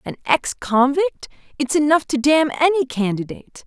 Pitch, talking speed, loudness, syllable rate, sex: 285 Hz, 130 wpm, -19 LUFS, 4.7 syllables/s, female